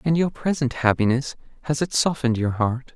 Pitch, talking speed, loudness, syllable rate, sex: 135 Hz, 185 wpm, -22 LUFS, 5.5 syllables/s, male